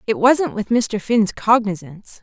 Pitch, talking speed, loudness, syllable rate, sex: 215 Hz, 160 wpm, -18 LUFS, 4.3 syllables/s, female